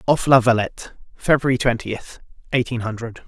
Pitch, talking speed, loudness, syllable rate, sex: 120 Hz, 130 wpm, -20 LUFS, 5.3 syllables/s, male